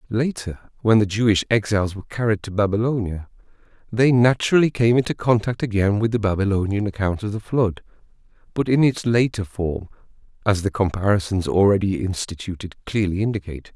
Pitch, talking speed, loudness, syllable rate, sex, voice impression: 105 Hz, 150 wpm, -21 LUFS, 5.8 syllables/s, male, masculine, middle-aged, slightly relaxed, powerful, slightly soft, slightly muffled, slightly raspy, intellectual, calm, slightly mature, slightly reassuring, wild, slightly kind, modest